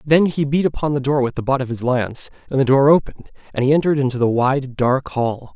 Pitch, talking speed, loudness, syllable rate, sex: 135 Hz, 260 wpm, -18 LUFS, 6.2 syllables/s, male